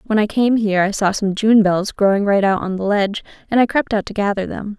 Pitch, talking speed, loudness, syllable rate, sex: 205 Hz, 265 wpm, -17 LUFS, 6.1 syllables/s, female